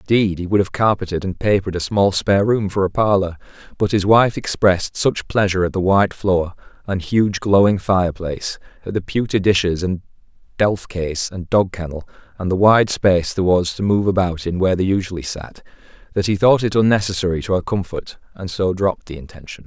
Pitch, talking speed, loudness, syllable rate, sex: 95 Hz, 200 wpm, -18 LUFS, 5.8 syllables/s, male